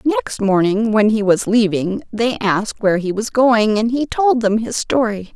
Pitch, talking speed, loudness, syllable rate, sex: 220 Hz, 200 wpm, -16 LUFS, 4.5 syllables/s, female